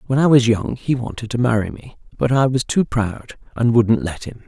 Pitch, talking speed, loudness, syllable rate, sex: 120 Hz, 240 wpm, -18 LUFS, 5.1 syllables/s, male